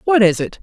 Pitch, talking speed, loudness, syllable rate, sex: 205 Hz, 290 wpm, -15 LUFS, 6.0 syllables/s, female